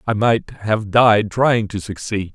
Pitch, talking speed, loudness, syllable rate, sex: 105 Hz, 180 wpm, -18 LUFS, 3.6 syllables/s, male